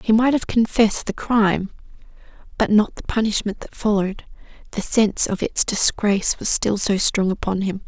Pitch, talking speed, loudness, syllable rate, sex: 210 Hz, 175 wpm, -19 LUFS, 5.3 syllables/s, female